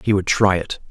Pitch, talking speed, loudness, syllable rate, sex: 95 Hz, 265 wpm, -18 LUFS, 5.4 syllables/s, male